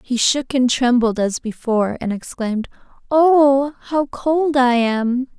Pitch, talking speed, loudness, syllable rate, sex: 255 Hz, 145 wpm, -18 LUFS, 3.9 syllables/s, female